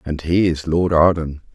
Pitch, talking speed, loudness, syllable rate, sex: 80 Hz, 195 wpm, -17 LUFS, 4.4 syllables/s, male